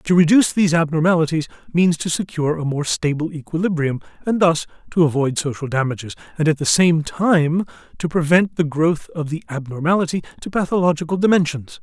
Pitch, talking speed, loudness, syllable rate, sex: 160 Hz, 160 wpm, -19 LUFS, 5.8 syllables/s, male